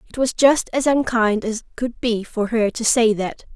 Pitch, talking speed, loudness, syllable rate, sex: 230 Hz, 220 wpm, -19 LUFS, 4.4 syllables/s, female